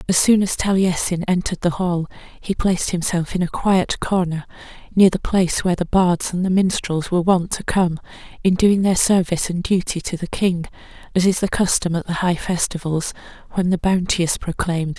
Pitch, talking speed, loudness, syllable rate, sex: 180 Hz, 195 wpm, -19 LUFS, 5.4 syllables/s, female